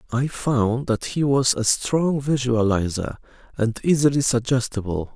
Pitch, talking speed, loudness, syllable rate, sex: 125 Hz, 130 wpm, -21 LUFS, 4.3 syllables/s, male